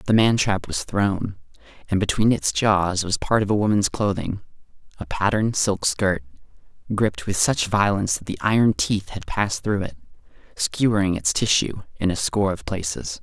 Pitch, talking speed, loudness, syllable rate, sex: 100 Hz, 170 wpm, -22 LUFS, 5.1 syllables/s, male